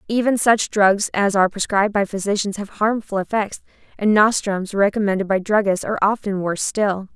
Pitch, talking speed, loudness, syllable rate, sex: 205 Hz, 170 wpm, -19 LUFS, 5.5 syllables/s, female